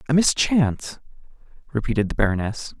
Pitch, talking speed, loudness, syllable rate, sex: 125 Hz, 105 wpm, -22 LUFS, 5.9 syllables/s, male